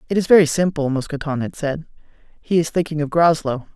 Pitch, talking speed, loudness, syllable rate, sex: 155 Hz, 190 wpm, -19 LUFS, 6.1 syllables/s, male